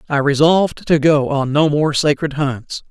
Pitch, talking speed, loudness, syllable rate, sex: 150 Hz, 185 wpm, -16 LUFS, 4.5 syllables/s, male